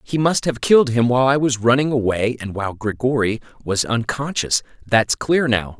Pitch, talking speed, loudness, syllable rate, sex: 120 Hz, 185 wpm, -19 LUFS, 5.2 syllables/s, male